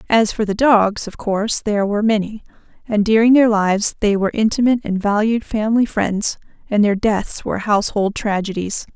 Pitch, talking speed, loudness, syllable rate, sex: 215 Hz, 175 wpm, -17 LUFS, 5.6 syllables/s, female